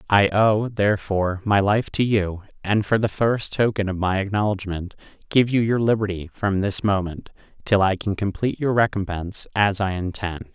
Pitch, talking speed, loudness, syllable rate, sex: 100 Hz, 175 wpm, -22 LUFS, 5.0 syllables/s, male